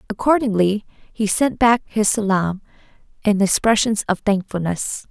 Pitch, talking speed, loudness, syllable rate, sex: 210 Hz, 115 wpm, -19 LUFS, 4.4 syllables/s, female